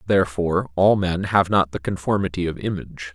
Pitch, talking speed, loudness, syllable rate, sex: 90 Hz, 170 wpm, -21 LUFS, 5.9 syllables/s, male